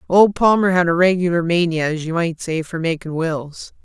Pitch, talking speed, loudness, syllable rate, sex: 170 Hz, 205 wpm, -18 LUFS, 5.0 syllables/s, female